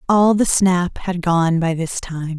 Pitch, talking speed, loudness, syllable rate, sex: 175 Hz, 200 wpm, -18 LUFS, 3.6 syllables/s, female